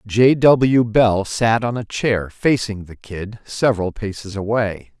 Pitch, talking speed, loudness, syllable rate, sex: 110 Hz, 155 wpm, -18 LUFS, 3.8 syllables/s, male